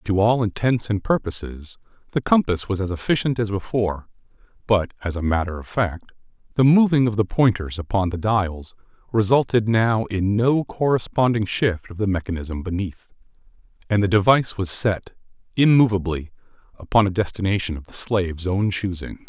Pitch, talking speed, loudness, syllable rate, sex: 105 Hz, 150 wpm, -21 LUFS, 5.2 syllables/s, male